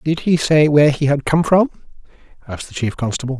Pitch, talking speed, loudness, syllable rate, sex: 145 Hz, 210 wpm, -16 LUFS, 6.4 syllables/s, male